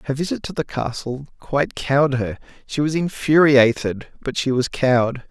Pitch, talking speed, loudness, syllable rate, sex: 135 Hz, 170 wpm, -20 LUFS, 5.0 syllables/s, male